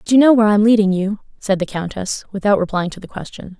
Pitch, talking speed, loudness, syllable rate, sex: 200 Hz, 265 wpm, -16 LUFS, 6.8 syllables/s, female